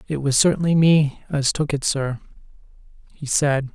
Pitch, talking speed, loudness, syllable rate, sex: 145 Hz, 160 wpm, -20 LUFS, 4.3 syllables/s, male